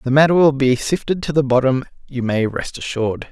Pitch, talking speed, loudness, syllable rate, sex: 135 Hz, 215 wpm, -18 LUFS, 5.7 syllables/s, male